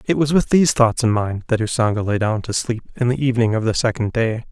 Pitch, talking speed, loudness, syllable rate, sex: 120 Hz, 265 wpm, -19 LUFS, 6.2 syllables/s, male